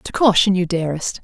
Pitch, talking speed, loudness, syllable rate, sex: 185 Hz, 195 wpm, -17 LUFS, 5.9 syllables/s, female